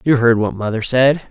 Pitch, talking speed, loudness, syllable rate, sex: 120 Hz, 230 wpm, -16 LUFS, 5.3 syllables/s, male